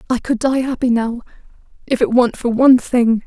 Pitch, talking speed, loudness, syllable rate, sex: 245 Hz, 185 wpm, -16 LUFS, 5.8 syllables/s, female